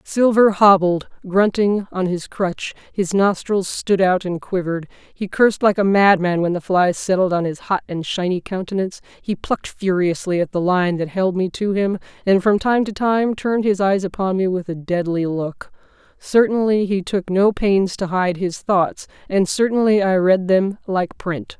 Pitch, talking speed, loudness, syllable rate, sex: 190 Hz, 190 wpm, -19 LUFS, 4.6 syllables/s, female